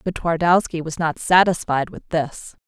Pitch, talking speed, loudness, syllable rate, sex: 165 Hz, 155 wpm, -20 LUFS, 4.6 syllables/s, female